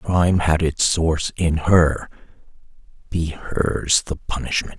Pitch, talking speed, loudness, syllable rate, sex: 80 Hz, 140 wpm, -20 LUFS, 4.0 syllables/s, male